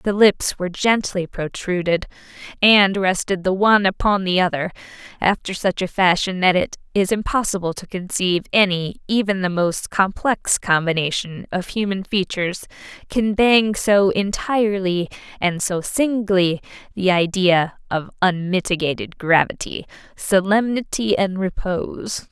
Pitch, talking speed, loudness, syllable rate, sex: 190 Hz, 120 wpm, -19 LUFS, 4.5 syllables/s, female